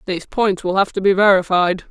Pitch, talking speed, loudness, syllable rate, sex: 190 Hz, 220 wpm, -16 LUFS, 5.9 syllables/s, female